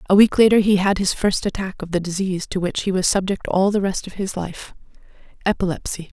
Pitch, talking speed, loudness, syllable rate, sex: 190 Hz, 215 wpm, -20 LUFS, 6.0 syllables/s, female